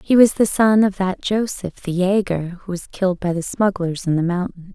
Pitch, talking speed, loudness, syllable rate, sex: 190 Hz, 230 wpm, -19 LUFS, 5.0 syllables/s, female